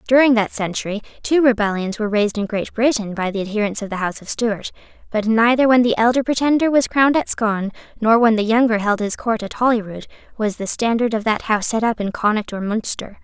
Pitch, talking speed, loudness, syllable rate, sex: 225 Hz, 220 wpm, -18 LUFS, 6.2 syllables/s, female